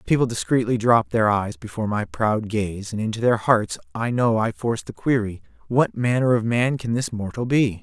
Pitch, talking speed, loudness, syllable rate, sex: 115 Hz, 205 wpm, -22 LUFS, 5.2 syllables/s, male